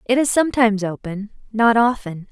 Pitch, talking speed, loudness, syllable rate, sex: 220 Hz, 130 wpm, -18 LUFS, 5.6 syllables/s, female